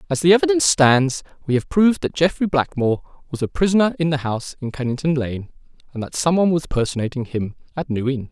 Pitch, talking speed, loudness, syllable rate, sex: 145 Hz, 210 wpm, -20 LUFS, 6.3 syllables/s, male